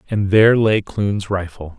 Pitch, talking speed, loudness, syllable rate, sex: 100 Hz, 170 wpm, -17 LUFS, 4.4 syllables/s, male